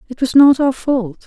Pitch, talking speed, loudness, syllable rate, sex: 250 Hz, 240 wpm, -14 LUFS, 4.6 syllables/s, female